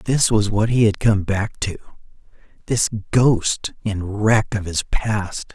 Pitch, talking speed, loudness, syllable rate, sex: 105 Hz, 150 wpm, -20 LUFS, 3.7 syllables/s, male